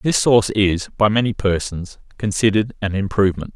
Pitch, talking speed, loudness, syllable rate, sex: 105 Hz, 150 wpm, -18 LUFS, 5.6 syllables/s, male